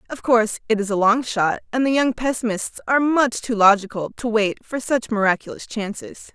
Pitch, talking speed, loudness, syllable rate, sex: 230 Hz, 200 wpm, -20 LUFS, 5.4 syllables/s, female